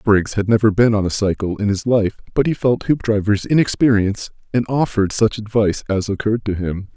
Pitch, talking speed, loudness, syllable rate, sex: 110 Hz, 200 wpm, -18 LUFS, 5.8 syllables/s, male